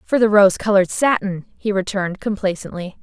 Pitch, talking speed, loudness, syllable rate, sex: 195 Hz, 160 wpm, -18 LUFS, 5.7 syllables/s, female